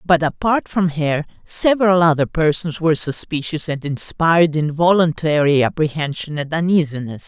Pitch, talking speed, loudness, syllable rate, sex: 160 Hz, 125 wpm, -18 LUFS, 5.0 syllables/s, female